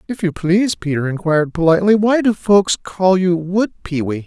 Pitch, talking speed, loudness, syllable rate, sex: 180 Hz, 185 wpm, -16 LUFS, 5.2 syllables/s, male